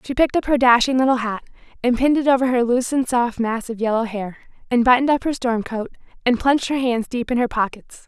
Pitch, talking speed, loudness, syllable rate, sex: 245 Hz, 240 wpm, -19 LUFS, 6.4 syllables/s, female